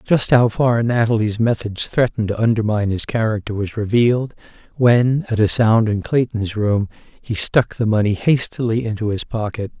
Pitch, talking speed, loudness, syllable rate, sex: 110 Hz, 165 wpm, -18 LUFS, 5.0 syllables/s, male